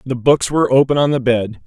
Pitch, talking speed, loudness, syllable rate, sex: 125 Hz, 255 wpm, -15 LUFS, 5.9 syllables/s, male